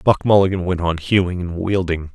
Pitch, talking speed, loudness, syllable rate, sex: 90 Hz, 195 wpm, -18 LUFS, 5.4 syllables/s, male